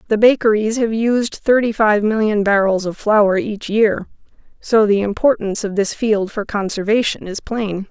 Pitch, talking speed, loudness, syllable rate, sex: 210 Hz, 165 wpm, -17 LUFS, 4.6 syllables/s, female